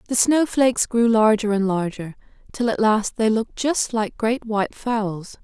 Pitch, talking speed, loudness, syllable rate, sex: 220 Hz, 190 wpm, -20 LUFS, 4.5 syllables/s, female